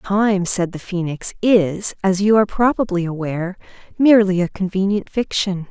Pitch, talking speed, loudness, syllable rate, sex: 190 Hz, 145 wpm, -18 LUFS, 4.9 syllables/s, female